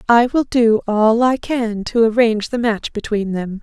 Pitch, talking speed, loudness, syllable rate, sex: 225 Hz, 200 wpm, -17 LUFS, 4.5 syllables/s, female